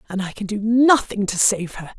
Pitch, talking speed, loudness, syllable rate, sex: 210 Hz, 240 wpm, -19 LUFS, 5.2 syllables/s, female